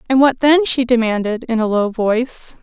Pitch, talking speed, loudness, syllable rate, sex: 240 Hz, 205 wpm, -16 LUFS, 4.9 syllables/s, female